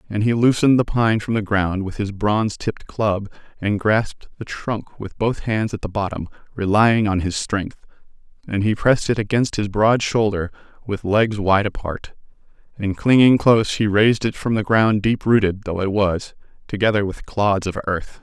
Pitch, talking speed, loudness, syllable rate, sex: 105 Hz, 190 wpm, -19 LUFS, 4.9 syllables/s, male